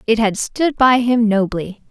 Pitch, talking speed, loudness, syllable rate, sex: 225 Hz, 190 wpm, -16 LUFS, 4.1 syllables/s, female